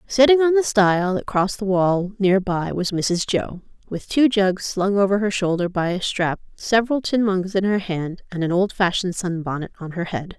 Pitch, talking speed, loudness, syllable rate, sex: 195 Hz, 215 wpm, -20 LUFS, 5.0 syllables/s, female